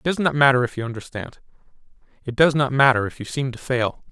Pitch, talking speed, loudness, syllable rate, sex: 130 Hz, 235 wpm, -20 LUFS, 6.3 syllables/s, male